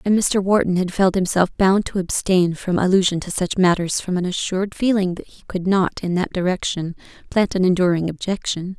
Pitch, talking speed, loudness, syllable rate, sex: 185 Hz, 200 wpm, -20 LUFS, 5.3 syllables/s, female